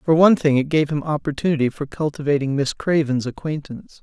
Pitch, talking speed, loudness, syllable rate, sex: 150 Hz, 180 wpm, -20 LUFS, 6.1 syllables/s, male